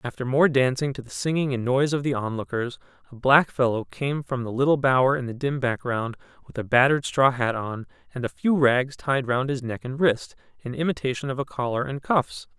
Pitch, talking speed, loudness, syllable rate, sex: 130 Hz, 220 wpm, -24 LUFS, 5.5 syllables/s, male